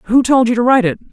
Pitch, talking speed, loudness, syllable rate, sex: 240 Hz, 320 wpm, -13 LUFS, 7.2 syllables/s, female